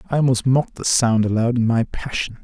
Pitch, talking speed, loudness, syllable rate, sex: 120 Hz, 220 wpm, -19 LUFS, 5.7 syllables/s, male